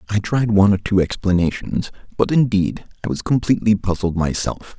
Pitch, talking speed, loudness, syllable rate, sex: 100 Hz, 165 wpm, -19 LUFS, 5.8 syllables/s, male